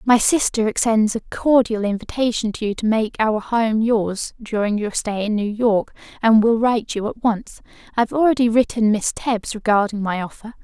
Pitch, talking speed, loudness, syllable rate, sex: 220 Hz, 190 wpm, -19 LUFS, 4.9 syllables/s, female